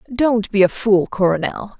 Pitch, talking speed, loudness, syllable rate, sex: 205 Hz, 165 wpm, -17 LUFS, 4.4 syllables/s, female